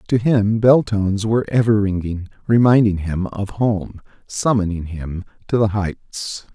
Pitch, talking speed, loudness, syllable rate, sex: 105 Hz, 145 wpm, -18 LUFS, 4.2 syllables/s, male